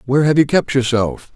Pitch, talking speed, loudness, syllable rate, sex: 135 Hz, 220 wpm, -16 LUFS, 5.8 syllables/s, male